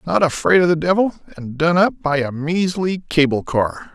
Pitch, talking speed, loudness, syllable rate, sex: 160 Hz, 200 wpm, -18 LUFS, 4.7 syllables/s, male